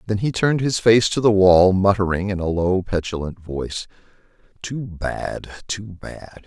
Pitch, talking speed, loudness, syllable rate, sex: 100 Hz, 160 wpm, -20 LUFS, 4.5 syllables/s, male